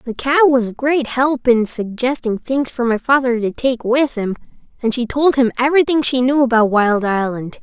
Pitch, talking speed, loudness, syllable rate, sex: 250 Hz, 205 wpm, -16 LUFS, 4.9 syllables/s, female